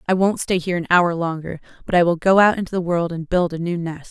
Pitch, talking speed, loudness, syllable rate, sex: 175 Hz, 290 wpm, -19 LUFS, 6.3 syllables/s, female